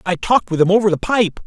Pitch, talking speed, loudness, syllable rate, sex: 190 Hz, 285 wpm, -16 LUFS, 6.8 syllables/s, male